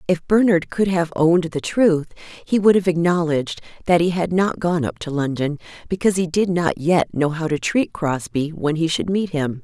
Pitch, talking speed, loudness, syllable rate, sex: 165 Hz, 210 wpm, -20 LUFS, 5.0 syllables/s, female